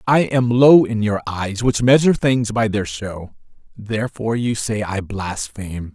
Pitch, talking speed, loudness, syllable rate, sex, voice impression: 110 Hz, 170 wpm, -18 LUFS, 4.5 syllables/s, male, masculine, adult-like, slightly powerful, clear, fluent, slightly raspy, slightly cool, slightly mature, friendly, wild, lively, slightly strict, slightly sharp